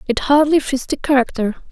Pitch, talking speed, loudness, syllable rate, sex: 270 Hz, 175 wpm, -17 LUFS, 5.6 syllables/s, female